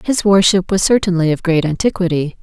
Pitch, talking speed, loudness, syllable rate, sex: 180 Hz, 175 wpm, -14 LUFS, 5.7 syllables/s, female